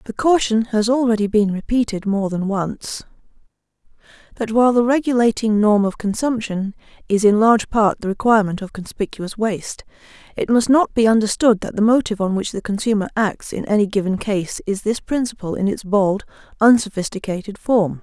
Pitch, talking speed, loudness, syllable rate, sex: 215 Hz, 165 wpm, -18 LUFS, 5.4 syllables/s, female